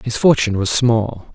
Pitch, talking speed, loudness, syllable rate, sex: 115 Hz, 180 wpm, -16 LUFS, 5.0 syllables/s, male